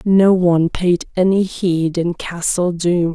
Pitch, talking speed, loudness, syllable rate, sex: 175 Hz, 155 wpm, -16 LUFS, 3.7 syllables/s, female